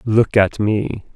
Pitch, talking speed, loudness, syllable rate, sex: 105 Hz, 155 wpm, -17 LUFS, 3.1 syllables/s, male